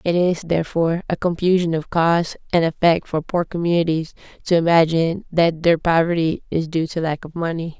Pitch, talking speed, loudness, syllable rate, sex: 165 Hz, 175 wpm, -19 LUFS, 5.5 syllables/s, female